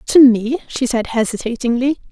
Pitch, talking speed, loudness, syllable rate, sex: 245 Hz, 140 wpm, -16 LUFS, 5.1 syllables/s, female